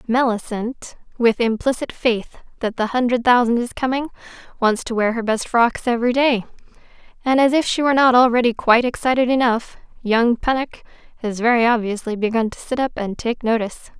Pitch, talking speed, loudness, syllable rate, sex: 240 Hz, 170 wpm, -19 LUFS, 5.6 syllables/s, female